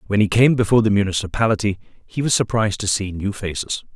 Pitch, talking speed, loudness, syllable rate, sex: 105 Hz, 195 wpm, -19 LUFS, 6.7 syllables/s, male